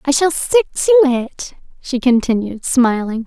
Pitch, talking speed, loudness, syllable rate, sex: 265 Hz, 145 wpm, -15 LUFS, 4.3 syllables/s, female